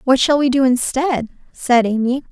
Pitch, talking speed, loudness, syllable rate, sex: 260 Hz, 180 wpm, -16 LUFS, 4.7 syllables/s, female